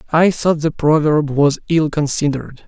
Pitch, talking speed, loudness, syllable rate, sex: 150 Hz, 155 wpm, -16 LUFS, 4.7 syllables/s, male